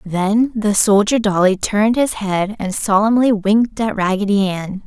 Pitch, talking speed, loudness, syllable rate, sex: 205 Hz, 160 wpm, -16 LUFS, 4.5 syllables/s, female